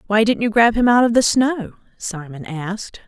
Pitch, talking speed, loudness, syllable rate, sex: 215 Hz, 215 wpm, -17 LUFS, 5.0 syllables/s, female